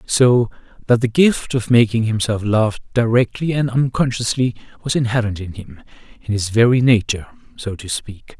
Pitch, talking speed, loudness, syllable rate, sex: 115 Hz, 155 wpm, -18 LUFS, 5.1 syllables/s, male